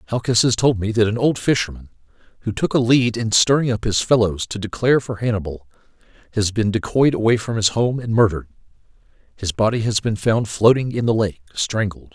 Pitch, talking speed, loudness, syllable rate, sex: 110 Hz, 200 wpm, -19 LUFS, 5.8 syllables/s, male